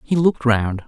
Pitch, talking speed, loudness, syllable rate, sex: 130 Hz, 205 wpm, -18 LUFS, 5.3 syllables/s, male